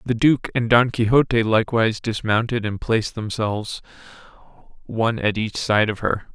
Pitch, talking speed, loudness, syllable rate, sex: 110 Hz, 150 wpm, -20 LUFS, 5.2 syllables/s, male